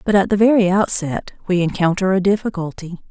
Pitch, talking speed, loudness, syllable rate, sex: 190 Hz, 175 wpm, -17 LUFS, 5.8 syllables/s, female